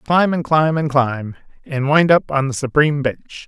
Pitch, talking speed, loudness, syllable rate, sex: 145 Hz, 190 wpm, -17 LUFS, 4.6 syllables/s, male